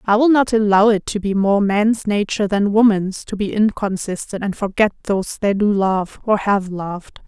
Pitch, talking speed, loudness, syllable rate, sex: 205 Hz, 200 wpm, -18 LUFS, 4.9 syllables/s, female